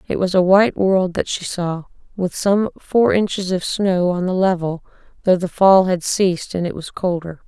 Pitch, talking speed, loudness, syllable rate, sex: 185 Hz, 210 wpm, -18 LUFS, 4.7 syllables/s, female